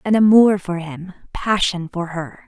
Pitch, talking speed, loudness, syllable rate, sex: 185 Hz, 170 wpm, -17 LUFS, 4.2 syllables/s, female